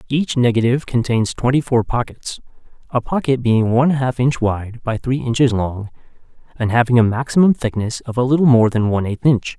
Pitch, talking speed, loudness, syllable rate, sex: 120 Hz, 180 wpm, -17 LUFS, 5.5 syllables/s, male